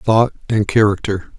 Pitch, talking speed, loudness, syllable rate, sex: 105 Hz, 130 wpm, -17 LUFS, 4.3 syllables/s, male